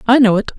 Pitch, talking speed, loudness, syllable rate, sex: 230 Hz, 310 wpm, -13 LUFS, 7.5 syllables/s, female